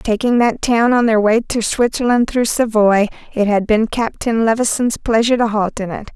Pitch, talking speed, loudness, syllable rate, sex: 225 Hz, 195 wpm, -16 LUFS, 5.0 syllables/s, female